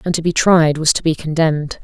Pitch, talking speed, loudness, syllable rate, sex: 160 Hz, 260 wpm, -15 LUFS, 5.8 syllables/s, female